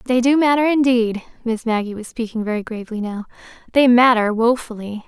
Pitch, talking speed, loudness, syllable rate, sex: 235 Hz, 155 wpm, -18 LUFS, 5.7 syllables/s, female